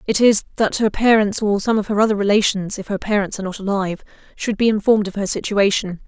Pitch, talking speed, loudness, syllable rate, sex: 205 Hz, 225 wpm, -18 LUFS, 6.4 syllables/s, female